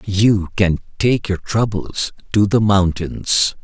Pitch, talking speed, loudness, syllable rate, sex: 100 Hz, 130 wpm, -17 LUFS, 3.2 syllables/s, male